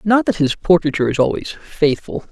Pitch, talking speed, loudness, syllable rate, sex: 165 Hz, 180 wpm, -17 LUFS, 5.6 syllables/s, male